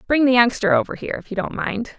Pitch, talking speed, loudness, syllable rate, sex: 235 Hz, 270 wpm, -19 LUFS, 6.6 syllables/s, female